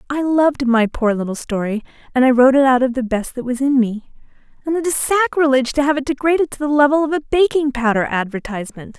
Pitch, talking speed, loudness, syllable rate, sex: 265 Hz, 225 wpm, -17 LUFS, 6.5 syllables/s, female